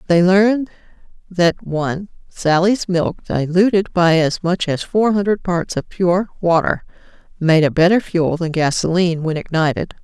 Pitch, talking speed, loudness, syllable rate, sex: 175 Hz, 150 wpm, -17 LUFS, 4.8 syllables/s, female